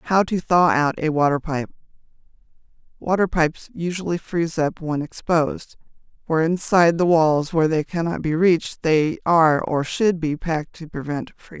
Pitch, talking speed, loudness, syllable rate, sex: 160 Hz, 160 wpm, -20 LUFS, 5.2 syllables/s, female